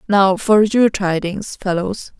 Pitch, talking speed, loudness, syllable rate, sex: 195 Hz, 135 wpm, -17 LUFS, 3.5 syllables/s, female